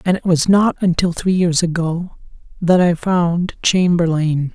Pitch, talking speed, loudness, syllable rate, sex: 175 Hz, 160 wpm, -16 LUFS, 4.3 syllables/s, male